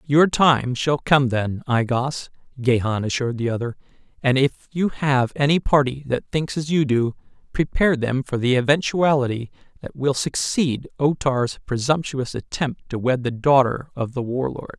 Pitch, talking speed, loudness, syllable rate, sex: 135 Hz, 165 wpm, -21 LUFS, 4.6 syllables/s, male